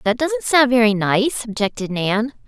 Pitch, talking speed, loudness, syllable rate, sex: 215 Hz, 170 wpm, -18 LUFS, 4.5 syllables/s, female